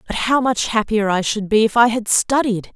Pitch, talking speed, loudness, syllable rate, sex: 220 Hz, 240 wpm, -17 LUFS, 5.0 syllables/s, female